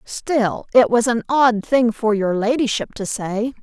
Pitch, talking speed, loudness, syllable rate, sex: 230 Hz, 180 wpm, -18 LUFS, 3.9 syllables/s, female